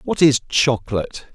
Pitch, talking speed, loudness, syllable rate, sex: 120 Hz, 135 wpm, -18 LUFS, 5.1 syllables/s, male